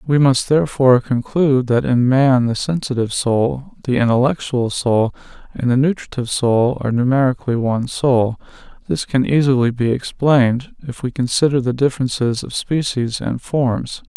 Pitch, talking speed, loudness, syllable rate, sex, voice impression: 130 Hz, 150 wpm, -17 LUFS, 5.2 syllables/s, male, masculine, very adult-like, slightly thick, weak, slightly sincere, calm, slightly elegant